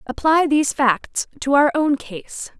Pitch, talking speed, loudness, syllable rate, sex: 285 Hz, 160 wpm, -18 LUFS, 4.1 syllables/s, female